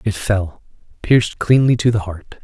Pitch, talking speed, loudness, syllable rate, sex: 105 Hz, 175 wpm, -16 LUFS, 4.7 syllables/s, male